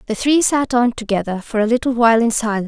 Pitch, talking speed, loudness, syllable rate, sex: 230 Hz, 245 wpm, -17 LUFS, 6.8 syllables/s, female